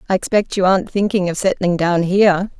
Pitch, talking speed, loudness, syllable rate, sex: 185 Hz, 210 wpm, -16 LUFS, 5.9 syllables/s, female